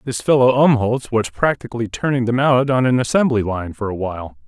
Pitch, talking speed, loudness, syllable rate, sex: 120 Hz, 200 wpm, -18 LUFS, 5.6 syllables/s, male